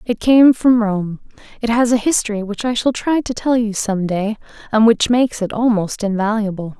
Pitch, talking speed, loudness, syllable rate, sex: 220 Hz, 205 wpm, -16 LUFS, 5.1 syllables/s, female